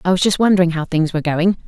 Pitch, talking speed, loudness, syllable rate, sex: 175 Hz, 285 wpm, -16 LUFS, 7.3 syllables/s, female